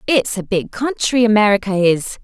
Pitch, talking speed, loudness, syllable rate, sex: 210 Hz, 135 wpm, -16 LUFS, 4.9 syllables/s, female